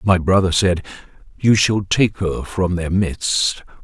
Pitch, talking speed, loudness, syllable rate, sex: 90 Hz, 155 wpm, -18 LUFS, 3.7 syllables/s, male